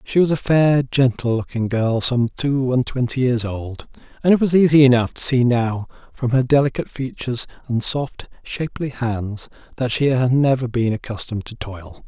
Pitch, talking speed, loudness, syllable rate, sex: 125 Hz, 185 wpm, -19 LUFS, 5.0 syllables/s, male